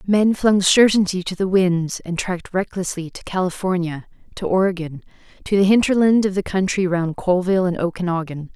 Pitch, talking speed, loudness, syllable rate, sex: 185 Hz, 160 wpm, -19 LUFS, 5.3 syllables/s, female